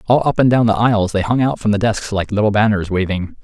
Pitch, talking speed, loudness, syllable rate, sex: 105 Hz, 280 wpm, -16 LUFS, 6.2 syllables/s, male